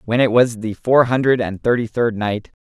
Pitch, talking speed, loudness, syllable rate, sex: 115 Hz, 230 wpm, -17 LUFS, 4.9 syllables/s, male